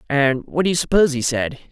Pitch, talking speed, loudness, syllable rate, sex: 145 Hz, 245 wpm, -19 LUFS, 6.4 syllables/s, male